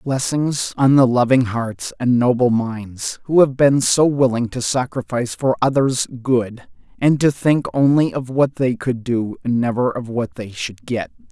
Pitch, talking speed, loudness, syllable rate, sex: 125 Hz, 180 wpm, -18 LUFS, 4.2 syllables/s, male